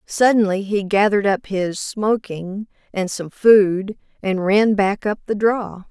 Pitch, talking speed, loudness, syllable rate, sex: 200 Hz, 150 wpm, -19 LUFS, 3.8 syllables/s, female